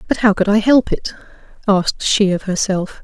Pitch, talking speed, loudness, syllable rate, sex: 200 Hz, 200 wpm, -16 LUFS, 5.2 syllables/s, female